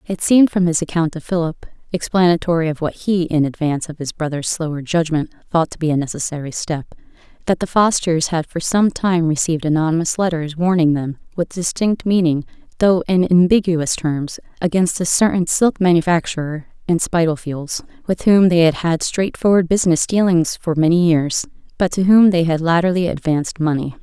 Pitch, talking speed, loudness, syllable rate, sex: 170 Hz, 170 wpm, -17 LUFS, 4.4 syllables/s, female